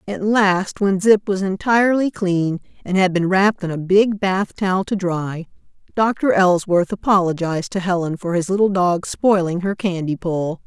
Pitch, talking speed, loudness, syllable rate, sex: 190 Hz, 175 wpm, -18 LUFS, 4.7 syllables/s, female